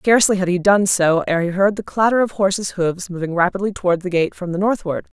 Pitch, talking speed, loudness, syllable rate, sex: 185 Hz, 245 wpm, -18 LUFS, 6.0 syllables/s, female